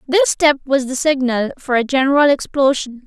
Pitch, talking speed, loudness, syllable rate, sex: 270 Hz, 175 wpm, -16 LUFS, 5.0 syllables/s, female